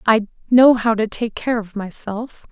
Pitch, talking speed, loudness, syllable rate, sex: 225 Hz, 190 wpm, -18 LUFS, 4.2 syllables/s, female